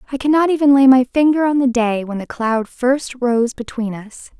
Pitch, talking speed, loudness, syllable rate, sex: 255 Hz, 220 wpm, -16 LUFS, 4.9 syllables/s, female